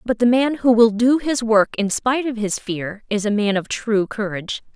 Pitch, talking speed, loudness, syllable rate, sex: 225 Hz, 240 wpm, -19 LUFS, 4.9 syllables/s, female